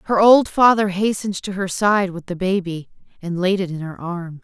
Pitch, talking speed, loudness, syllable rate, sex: 190 Hz, 215 wpm, -19 LUFS, 5.1 syllables/s, female